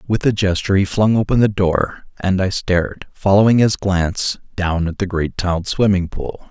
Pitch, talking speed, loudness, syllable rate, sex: 95 Hz, 195 wpm, -17 LUFS, 5.0 syllables/s, male